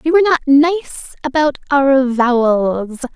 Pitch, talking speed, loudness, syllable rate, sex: 275 Hz, 135 wpm, -14 LUFS, 5.2 syllables/s, female